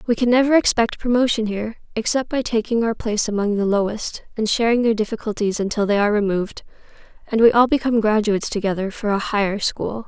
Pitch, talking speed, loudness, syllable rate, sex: 220 Hz, 190 wpm, -20 LUFS, 6.3 syllables/s, female